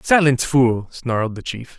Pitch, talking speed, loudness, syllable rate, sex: 125 Hz, 170 wpm, -19 LUFS, 4.8 syllables/s, male